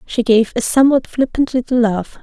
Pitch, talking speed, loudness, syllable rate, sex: 240 Hz, 190 wpm, -15 LUFS, 5.3 syllables/s, female